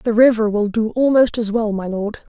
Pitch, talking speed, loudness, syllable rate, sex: 220 Hz, 230 wpm, -17 LUFS, 4.9 syllables/s, female